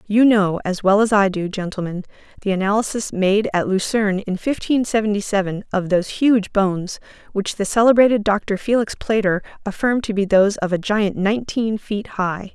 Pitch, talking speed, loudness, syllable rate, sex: 205 Hz, 175 wpm, -19 LUFS, 5.3 syllables/s, female